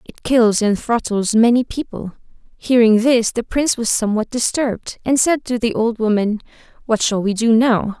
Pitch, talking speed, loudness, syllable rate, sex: 230 Hz, 180 wpm, -17 LUFS, 4.9 syllables/s, female